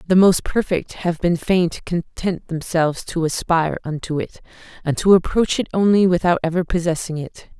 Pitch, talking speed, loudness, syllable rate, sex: 175 Hz, 175 wpm, -19 LUFS, 5.2 syllables/s, female